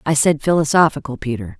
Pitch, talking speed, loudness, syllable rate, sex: 145 Hz, 150 wpm, -17 LUFS, 6.1 syllables/s, female